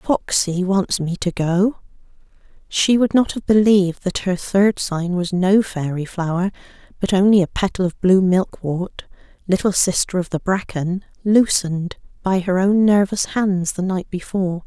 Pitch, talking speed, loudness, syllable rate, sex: 190 Hz, 155 wpm, -19 LUFS, 4.4 syllables/s, female